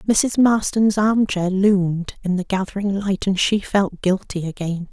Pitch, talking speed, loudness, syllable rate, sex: 195 Hz, 160 wpm, -19 LUFS, 4.3 syllables/s, female